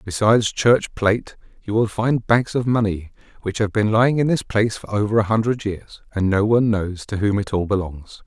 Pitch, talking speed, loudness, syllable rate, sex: 105 Hz, 220 wpm, -20 LUFS, 5.4 syllables/s, male